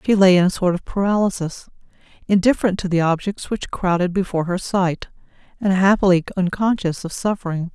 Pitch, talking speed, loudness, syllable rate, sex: 185 Hz, 165 wpm, -19 LUFS, 5.8 syllables/s, female